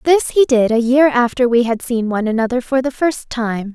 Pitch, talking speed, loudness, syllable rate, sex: 245 Hz, 240 wpm, -16 LUFS, 5.2 syllables/s, female